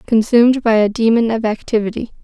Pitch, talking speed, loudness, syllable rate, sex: 225 Hz, 160 wpm, -15 LUFS, 6.1 syllables/s, female